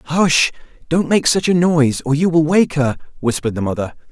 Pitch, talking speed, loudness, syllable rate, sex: 150 Hz, 205 wpm, -16 LUFS, 5.4 syllables/s, male